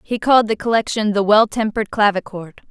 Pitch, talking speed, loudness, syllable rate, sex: 210 Hz, 175 wpm, -17 LUFS, 5.9 syllables/s, female